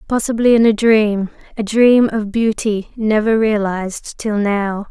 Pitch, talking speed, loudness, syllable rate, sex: 215 Hz, 135 wpm, -16 LUFS, 4.1 syllables/s, female